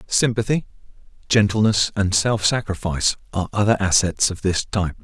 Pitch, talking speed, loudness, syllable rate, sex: 100 Hz, 130 wpm, -20 LUFS, 5.5 syllables/s, male